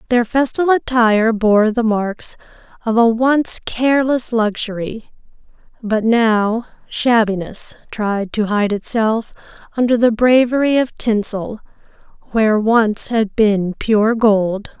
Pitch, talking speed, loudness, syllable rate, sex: 225 Hz, 120 wpm, -16 LUFS, 3.7 syllables/s, female